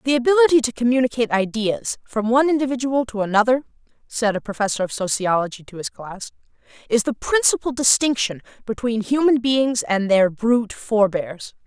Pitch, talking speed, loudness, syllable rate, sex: 230 Hz, 150 wpm, -20 LUFS, 5.5 syllables/s, female